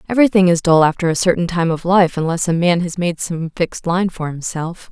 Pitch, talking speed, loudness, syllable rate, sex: 175 Hz, 230 wpm, -17 LUFS, 5.8 syllables/s, female